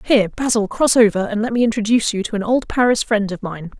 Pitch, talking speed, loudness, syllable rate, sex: 220 Hz, 255 wpm, -17 LUFS, 6.3 syllables/s, female